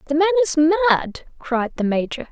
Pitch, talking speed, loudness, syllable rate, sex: 305 Hz, 180 wpm, -19 LUFS, 5.5 syllables/s, female